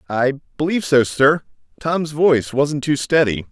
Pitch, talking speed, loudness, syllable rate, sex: 140 Hz, 155 wpm, -18 LUFS, 4.9 syllables/s, male